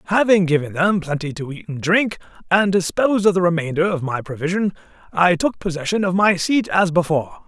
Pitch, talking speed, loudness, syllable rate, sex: 175 Hz, 195 wpm, -19 LUFS, 5.8 syllables/s, male